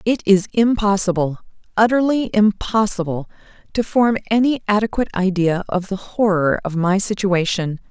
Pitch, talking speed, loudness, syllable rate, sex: 200 Hz, 105 wpm, -18 LUFS, 4.8 syllables/s, female